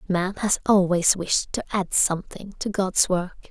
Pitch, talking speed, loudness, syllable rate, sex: 185 Hz, 170 wpm, -22 LUFS, 4.3 syllables/s, female